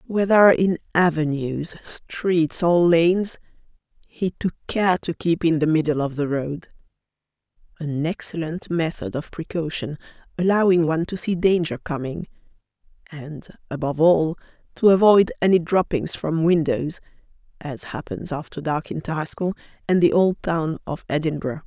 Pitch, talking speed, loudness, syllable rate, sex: 165 Hz, 135 wpm, -21 LUFS, 4.6 syllables/s, female